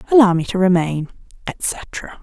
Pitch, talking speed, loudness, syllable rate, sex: 190 Hz, 135 wpm, -18 LUFS, 4.2 syllables/s, female